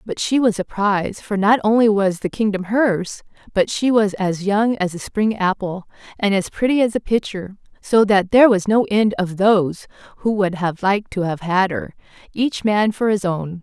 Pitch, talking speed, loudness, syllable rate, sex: 200 Hz, 210 wpm, -18 LUFS, 4.9 syllables/s, female